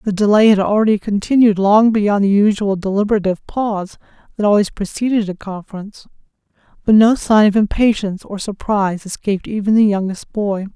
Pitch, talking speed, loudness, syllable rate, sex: 205 Hz, 155 wpm, -15 LUFS, 5.8 syllables/s, female